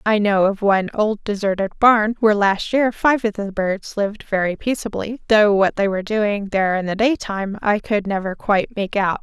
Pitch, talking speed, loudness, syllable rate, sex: 205 Hz, 210 wpm, -19 LUFS, 5.3 syllables/s, female